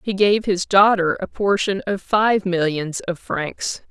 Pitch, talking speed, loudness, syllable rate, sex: 190 Hz, 170 wpm, -19 LUFS, 3.8 syllables/s, female